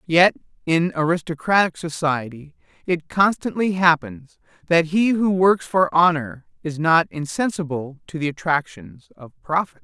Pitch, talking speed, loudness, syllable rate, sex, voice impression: 165 Hz, 130 wpm, -20 LUFS, 4.5 syllables/s, male, masculine, slightly middle-aged, slightly relaxed, slightly powerful, bright, slightly hard, slightly clear, fluent, slightly raspy, slightly cool, intellectual, slightly refreshing, slightly sincere, calm, slightly friendly, slightly reassuring, very unique, slightly elegant, wild, slightly sweet, lively, kind, slightly intense